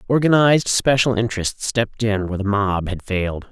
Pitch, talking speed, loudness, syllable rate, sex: 110 Hz, 170 wpm, -19 LUFS, 5.7 syllables/s, male